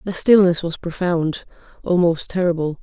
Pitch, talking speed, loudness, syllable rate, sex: 175 Hz, 125 wpm, -18 LUFS, 4.7 syllables/s, female